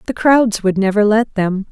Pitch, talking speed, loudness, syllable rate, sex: 210 Hz, 210 wpm, -14 LUFS, 4.6 syllables/s, female